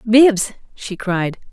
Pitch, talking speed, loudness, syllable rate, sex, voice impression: 210 Hz, 120 wpm, -17 LUFS, 2.7 syllables/s, female, feminine, adult-like, slightly clear, intellectual, slightly strict